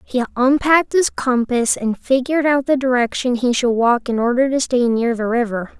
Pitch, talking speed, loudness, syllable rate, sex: 250 Hz, 195 wpm, -17 LUFS, 5.1 syllables/s, female